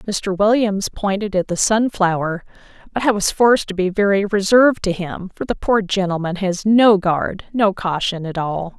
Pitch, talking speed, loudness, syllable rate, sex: 195 Hz, 185 wpm, -18 LUFS, 4.7 syllables/s, female